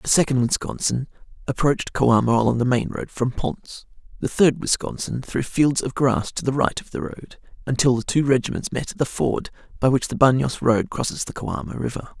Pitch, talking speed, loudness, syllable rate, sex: 130 Hz, 200 wpm, -22 LUFS, 5.4 syllables/s, male